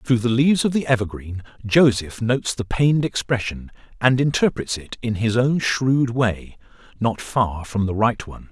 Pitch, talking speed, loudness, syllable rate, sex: 115 Hz, 170 wpm, -20 LUFS, 4.8 syllables/s, male